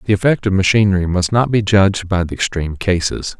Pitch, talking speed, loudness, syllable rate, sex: 95 Hz, 210 wpm, -16 LUFS, 6.2 syllables/s, male